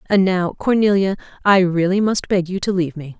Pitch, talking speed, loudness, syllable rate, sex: 185 Hz, 205 wpm, -18 LUFS, 5.6 syllables/s, female